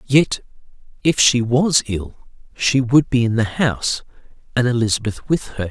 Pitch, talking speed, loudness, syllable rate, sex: 120 Hz, 160 wpm, -18 LUFS, 4.6 syllables/s, male